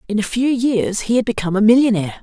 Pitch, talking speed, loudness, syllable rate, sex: 220 Hz, 245 wpm, -16 LUFS, 7.0 syllables/s, female